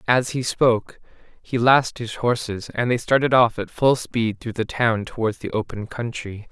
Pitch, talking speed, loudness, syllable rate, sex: 115 Hz, 195 wpm, -21 LUFS, 4.6 syllables/s, male